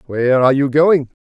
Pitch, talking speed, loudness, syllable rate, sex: 140 Hz, 195 wpm, -14 LUFS, 6.1 syllables/s, male